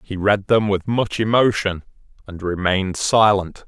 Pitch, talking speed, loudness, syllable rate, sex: 100 Hz, 145 wpm, -19 LUFS, 4.4 syllables/s, male